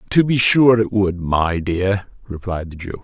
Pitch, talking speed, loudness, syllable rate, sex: 100 Hz, 195 wpm, -17 LUFS, 4.3 syllables/s, male